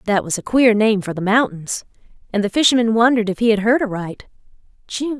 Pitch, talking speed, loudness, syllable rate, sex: 220 Hz, 195 wpm, -17 LUFS, 5.9 syllables/s, female